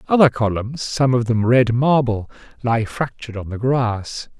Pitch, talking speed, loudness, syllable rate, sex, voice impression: 120 Hz, 165 wpm, -19 LUFS, 4.4 syllables/s, male, very masculine, very middle-aged, very thick, slightly tensed, powerful, very bright, soft, clear, fluent, slightly raspy, cool, intellectual, refreshing, very sincere, very calm, very mature, friendly, reassuring, very unique, elegant, wild, slightly sweet, lively, kind